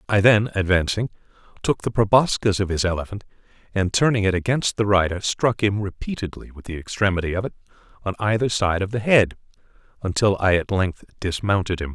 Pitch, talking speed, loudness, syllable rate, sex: 100 Hz, 175 wpm, -21 LUFS, 5.8 syllables/s, male